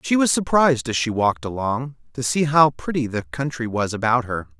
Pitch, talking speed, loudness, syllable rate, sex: 125 Hz, 210 wpm, -21 LUFS, 5.4 syllables/s, male